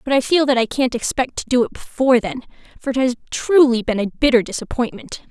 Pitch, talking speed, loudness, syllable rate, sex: 250 Hz, 225 wpm, -18 LUFS, 6.2 syllables/s, female